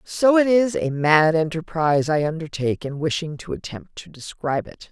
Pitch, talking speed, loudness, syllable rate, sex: 165 Hz, 185 wpm, -21 LUFS, 5.2 syllables/s, female